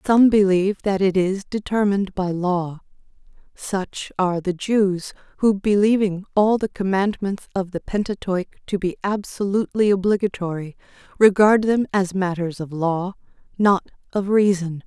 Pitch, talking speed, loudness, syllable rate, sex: 195 Hz, 135 wpm, -21 LUFS, 4.7 syllables/s, female